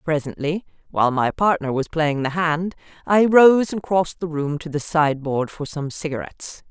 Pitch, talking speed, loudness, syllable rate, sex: 160 Hz, 180 wpm, -20 LUFS, 5.0 syllables/s, female